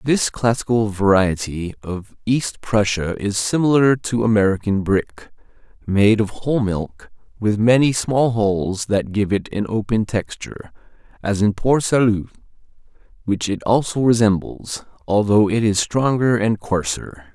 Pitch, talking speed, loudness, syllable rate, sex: 105 Hz, 135 wpm, -19 LUFS, 4.3 syllables/s, male